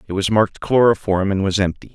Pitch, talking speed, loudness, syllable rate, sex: 100 Hz, 215 wpm, -18 LUFS, 6.2 syllables/s, male